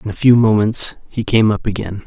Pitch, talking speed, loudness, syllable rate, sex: 110 Hz, 235 wpm, -15 LUFS, 5.2 syllables/s, male